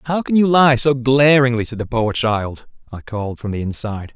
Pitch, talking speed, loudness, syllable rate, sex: 125 Hz, 215 wpm, -17 LUFS, 5.3 syllables/s, male